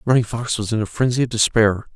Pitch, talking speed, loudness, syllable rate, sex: 115 Hz, 245 wpm, -19 LUFS, 6.0 syllables/s, male